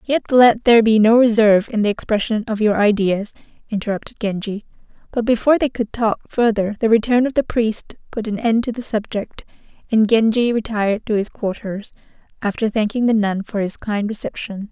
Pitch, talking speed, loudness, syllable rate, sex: 220 Hz, 185 wpm, -18 LUFS, 5.5 syllables/s, female